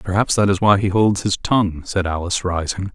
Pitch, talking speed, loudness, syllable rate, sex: 95 Hz, 225 wpm, -18 LUFS, 5.8 syllables/s, male